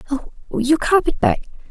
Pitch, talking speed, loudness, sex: 295 Hz, 140 wpm, -19 LUFS, female